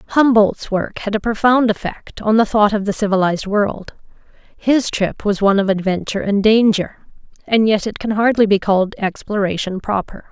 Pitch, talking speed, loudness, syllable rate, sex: 210 Hz, 175 wpm, -17 LUFS, 5.0 syllables/s, female